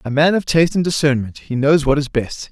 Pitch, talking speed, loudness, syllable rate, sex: 145 Hz, 265 wpm, -17 LUFS, 5.8 syllables/s, male